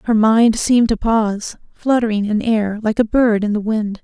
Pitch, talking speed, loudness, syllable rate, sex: 220 Hz, 210 wpm, -16 LUFS, 4.9 syllables/s, female